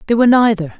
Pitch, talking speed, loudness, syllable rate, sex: 220 Hz, 225 wpm, -13 LUFS, 8.2 syllables/s, female